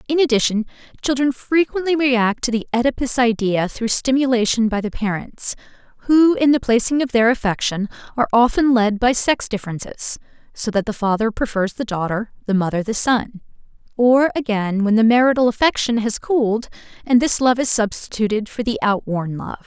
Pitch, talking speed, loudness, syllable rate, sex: 235 Hz, 170 wpm, -18 LUFS, 5.4 syllables/s, female